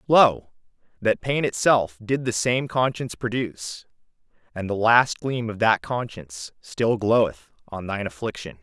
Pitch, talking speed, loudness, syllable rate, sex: 110 Hz, 145 wpm, -23 LUFS, 4.5 syllables/s, male